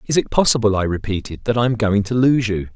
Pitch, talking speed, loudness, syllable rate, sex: 110 Hz, 260 wpm, -18 LUFS, 6.1 syllables/s, male